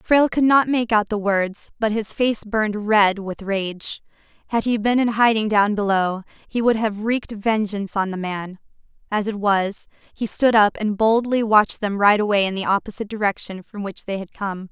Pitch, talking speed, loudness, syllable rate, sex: 210 Hz, 205 wpm, -20 LUFS, 5.0 syllables/s, female